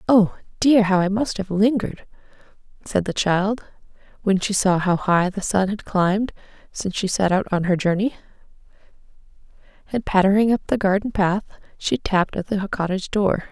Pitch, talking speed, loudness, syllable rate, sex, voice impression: 200 Hz, 170 wpm, -21 LUFS, 5.3 syllables/s, female, feminine, adult-like, slightly relaxed, soft, fluent, raspy, calm, reassuring, elegant, kind, modest